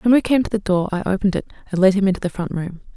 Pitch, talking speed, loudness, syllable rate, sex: 195 Hz, 325 wpm, -19 LUFS, 7.5 syllables/s, female